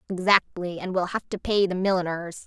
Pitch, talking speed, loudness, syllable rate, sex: 185 Hz, 195 wpm, -25 LUFS, 5.3 syllables/s, female